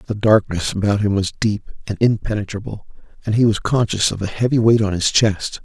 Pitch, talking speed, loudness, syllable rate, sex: 105 Hz, 200 wpm, -18 LUFS, 5.6 syllables/s, male